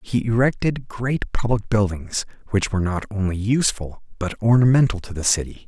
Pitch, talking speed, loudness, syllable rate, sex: 110 Hz, 160 wpm, -21 LUFS, 5.3 syllables/s, male